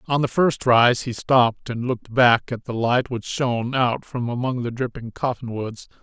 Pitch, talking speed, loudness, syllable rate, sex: 120 Hz, 200 wpm, -21 LUFS, 4.7 syllables/s, male